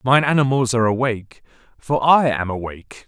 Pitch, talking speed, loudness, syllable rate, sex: 120 Hz, 155 wpm, -18 LUFS, 5.8 syllables/s, male